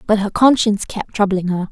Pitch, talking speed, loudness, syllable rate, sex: 205 Hz, 210 wpm, -16 LUFS, 5.7 syllables/s, female